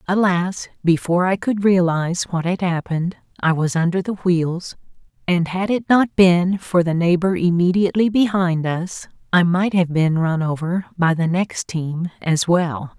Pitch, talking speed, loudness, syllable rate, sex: 175 Hz, 165 wpm, -19 LUFS, 4.5 syllables/s, female